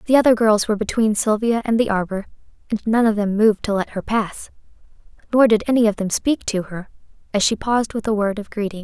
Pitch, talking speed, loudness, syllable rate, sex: 215 Hz, 230 wpm, -19 LUFS, 6.2 syllables/s, female